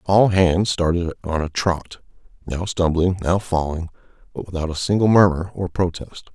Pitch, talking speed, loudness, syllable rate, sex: 90 Hz, 160 wpm, -20 LUFS, 4.7 syllables/s, male